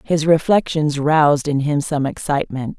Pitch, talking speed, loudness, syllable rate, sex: 150 Hz, 150 wpm, -17 LUFS, 4.8 syllables/s, female